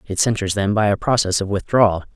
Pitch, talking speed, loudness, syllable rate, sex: 105 Hz, 225 wpm, -18 LUFS, 6.1 syllables/s, male